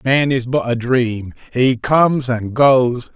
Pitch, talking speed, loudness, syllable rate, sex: 125 Hz, 170 wpm, -16 LUFS, 3.6 syllables/s, male